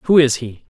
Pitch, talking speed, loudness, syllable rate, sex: 130 Hz, 230 wpm, -16 LUFS, 4.7 syllables/s, male